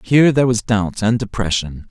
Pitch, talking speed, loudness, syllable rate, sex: 110 Hz, 190 wpm, -17 LUFS, 5.6 syllables/s, male